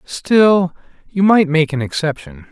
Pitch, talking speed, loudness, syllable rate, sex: 160 Hz, 145 wpm, -15 LUFS, 3.9 syllables/s, male